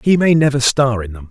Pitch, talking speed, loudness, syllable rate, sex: 130 Hz, 275 wpm, -14 LUFS, 5.8 syllables/s, male